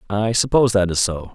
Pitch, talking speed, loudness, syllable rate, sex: 100 Hz, 225 wpm, -18 LUFS, 6.0 syllables/s, male